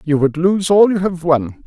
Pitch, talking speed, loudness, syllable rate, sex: 170 Hz, 250 wpm, -15 LUFS, 4.5 syllables/s, male